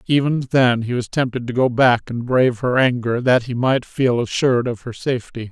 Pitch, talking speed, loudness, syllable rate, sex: 125 Hz, 220 wpm, -18 LUFS, 5.2 syllables/s, male